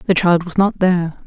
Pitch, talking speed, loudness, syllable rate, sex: 180 Hz, 235 wpm, -16 LUFS, 5.5 syllables/s, female